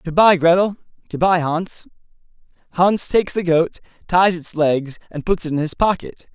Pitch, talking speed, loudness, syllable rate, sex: 170 Hz, 160 wpm, -18 LUFS, 4.8 syllables/s, male